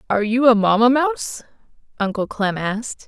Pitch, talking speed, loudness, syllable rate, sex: 225 Hz, 155 wpm, -19 LUFS, 5.6 syllables/s, female